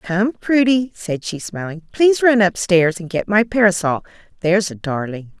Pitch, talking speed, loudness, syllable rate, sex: 195 Hz, 165 wpm, -18 LUFS, 4.8 syllables/s, female